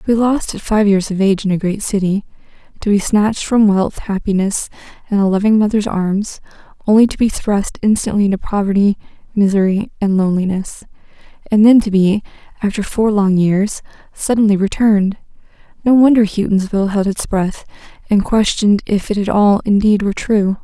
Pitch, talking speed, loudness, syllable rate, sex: 205 Hz, 165 wpm, -15 LUFS, 5.4 syllables/s, female